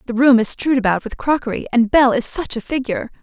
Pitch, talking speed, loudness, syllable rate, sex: 245 Hz, 240 wpm, -17 LUFS, 6.5 syllables/s, female